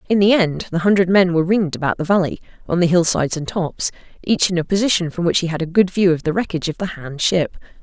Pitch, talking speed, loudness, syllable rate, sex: 175 Hz, 260 wpm, -18 LUFS, 6.7 syllables/s, female